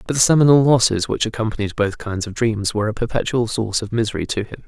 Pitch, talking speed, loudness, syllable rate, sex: 110 Hz, 230 wpm, -19 LUFS, 6.7 syllables/s, male